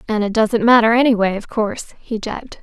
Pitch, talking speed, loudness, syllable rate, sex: 220 Hz, 205 wpm, -17 LUFS, 5.9 syllables/s, female